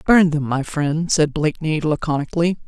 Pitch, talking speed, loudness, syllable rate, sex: 155 Hz, 155 wpm, -19 LUFS, 5.3 syllables/s, female